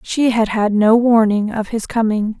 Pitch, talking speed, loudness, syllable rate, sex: 220 Hz, 200 wpm, -16 LUFS, 4.4 syllables/s, female